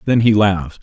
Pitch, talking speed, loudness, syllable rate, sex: 100 Hz, 220 wpm, -14 LUFS, 5.8 syllables/s, male